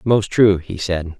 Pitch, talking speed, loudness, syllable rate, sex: 95 Hz, 200 wpm, -17 LUFS, 3.8 syllables/s, male